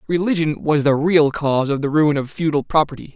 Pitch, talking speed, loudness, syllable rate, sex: 150 Hz, 210 wpm, -18 LUFS, 5.7 syllables/s, male